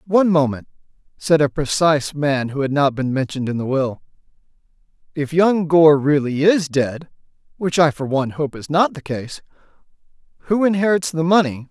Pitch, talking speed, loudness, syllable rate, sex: 150 Hz, 160 wpm, -18 LUFS, 5.3 syllables/s, male